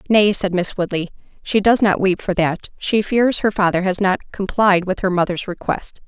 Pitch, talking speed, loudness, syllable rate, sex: 195 Hz, 195 wpm, -18 LUFS, 4.9 syllables/s, female